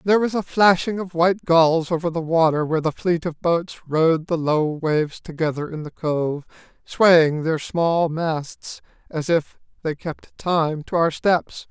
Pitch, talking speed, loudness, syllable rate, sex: 165 Hz, 180 wpm, -21 LUFS, 4.1 syllables/s, male